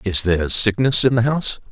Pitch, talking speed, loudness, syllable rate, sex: 115 Hz, 210 wpm, -16 LUFS, 5.8 syllables/s, male